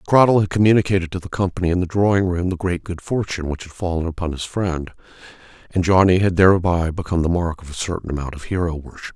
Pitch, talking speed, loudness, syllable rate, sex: 90 Hz, 225 wpm, -20 LUFS, 6.7 syllables/s, male